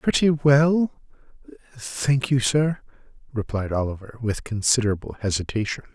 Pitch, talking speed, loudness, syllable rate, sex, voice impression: 125 Hz, 100 wpm, -23 LUFS, 4.8 syllables/s, male, masculine, middle-aged, slightly thick, sincere, slightly calm, slightly friendly